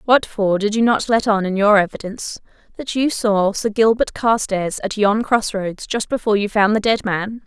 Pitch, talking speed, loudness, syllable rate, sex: 210 Hz, 215 wpm, -18 LUFS, 4.9 syllables/s, female